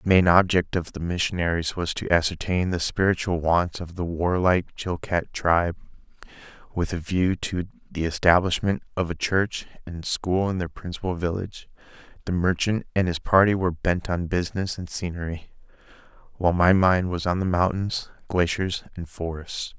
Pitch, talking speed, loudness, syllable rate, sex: 90 Hz, 160 wpm, -24 LUFS, 5.1 syllables/s, male